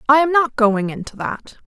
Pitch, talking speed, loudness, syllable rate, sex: 250 Hz, 215 wpm, -18 LUFS, 4.9 syllables/s, female